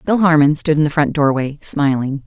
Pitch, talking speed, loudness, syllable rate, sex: 150 Hz, 210 wpm, -16 LUFS, 5.2 syllables/s, female